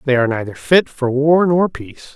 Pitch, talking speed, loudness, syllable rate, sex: 145 Hz, 225 wpm, -16 LUFS, 5.5 syllables/s, male